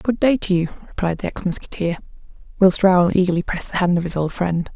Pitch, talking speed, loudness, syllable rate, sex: 180 Hz, 225 wpm, -19 LUFS, 6.2 syllables/s, female